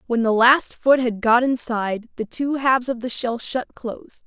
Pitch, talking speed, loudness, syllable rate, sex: 245 Hz, 210 wpm, -20 LUFS, 4.8 syllables/s, female